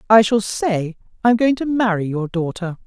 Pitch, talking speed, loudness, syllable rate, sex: 205 Hz, 210 wpm, -19 LUFS, 5.1 syllables/s, female